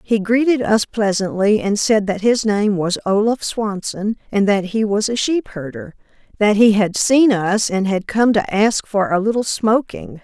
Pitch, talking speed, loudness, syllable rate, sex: 210 Hz, 195 wpm, -17 LUFS, 4.3 syllables/s, female